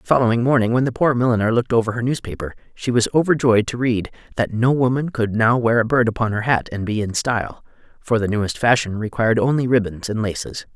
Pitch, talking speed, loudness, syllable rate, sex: 115 Hz, 225 wpm, -19 LUFS, 6.2 syllables/s, male